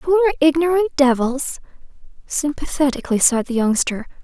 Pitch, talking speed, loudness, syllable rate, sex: 290 Hz, 100 wpm, -18 LUFS, 5.4 syllables/s, female